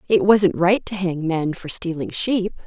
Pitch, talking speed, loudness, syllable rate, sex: 180 Hz, 205 wpm, -20 LUFS, 4.2 syllables/s, female